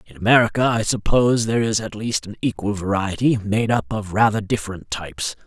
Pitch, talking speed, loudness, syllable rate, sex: 105 Hz, 185 wpm, -20 LUFS, 5.9 syllables/s, male